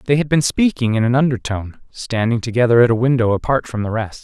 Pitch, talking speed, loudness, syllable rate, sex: 120 Hz, 225 wpm, -17 LUFS, 6.1 syllables/s, male